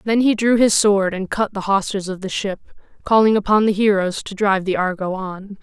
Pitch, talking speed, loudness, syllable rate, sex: 200 Hz, 225 wpm, -18 LUFS, 5.3 syllables/s, female